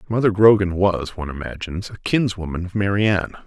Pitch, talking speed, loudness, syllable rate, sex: 100 Hz, 175 wpm, -20 LUFS, 6.2 syllables/s, male